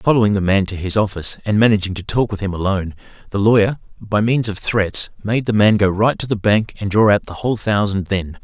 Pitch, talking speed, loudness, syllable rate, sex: 105 Hz, 240 wpm, -17 LUFS, 5.9 syllables/s, male